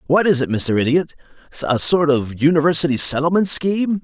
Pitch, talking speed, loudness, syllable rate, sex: 150 Hz, 150 wpm, -17 LUFS, 5.6 syllables/s, male